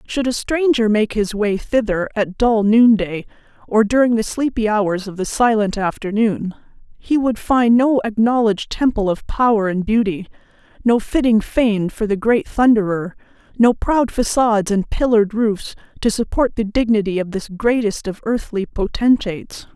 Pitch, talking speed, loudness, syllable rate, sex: 220 Hz, 160 wpm, -17 LUFS, 4.7 syllables/s, female